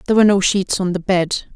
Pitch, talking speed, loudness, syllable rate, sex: 190 Hz, 270 wpm, -17 LUFS, 6.7 syllables/s, female